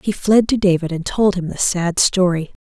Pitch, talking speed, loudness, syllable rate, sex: 185 Hz, 230 wpm, -17 LUFS, 4.9 syllables/s, female